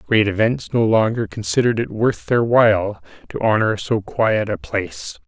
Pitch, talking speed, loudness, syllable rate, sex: 110 Hz, 170 wpm, -19 LUFS, 4.7 syllables/s, male